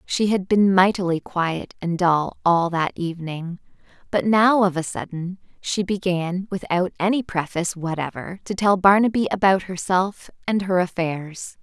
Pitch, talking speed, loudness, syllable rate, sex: 185 Hz, 150 wpm, -21 LUFS, 4.5 syllables/s, female